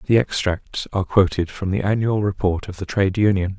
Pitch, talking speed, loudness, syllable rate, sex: 100 Hz, 200 wpm, -21 LUFS, 5.7 syllables/s, male